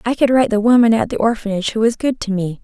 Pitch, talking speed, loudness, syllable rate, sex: 225 Hz, 295 wpm, -16 LUFS, 7.1 syllables/s, female